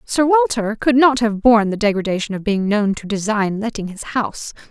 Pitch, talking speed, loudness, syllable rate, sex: 220 Hz, 205 wpm, -18 LUFS, 5.4 syllables/s, female